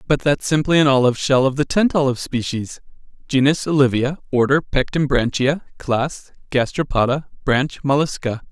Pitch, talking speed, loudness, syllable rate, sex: 135 Hz, 135 wpm, -19 LUFS, 5.4 syllables/s, male